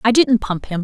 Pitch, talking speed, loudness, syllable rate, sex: 220 Hz, 285 wpm, -17 LUFS, 5.1 syllables/s, female